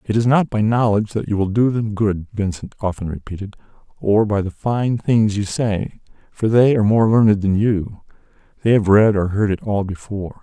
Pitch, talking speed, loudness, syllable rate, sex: 105 Hz, 200 wpm, -18 LUFS, 5.1 syllables/s, male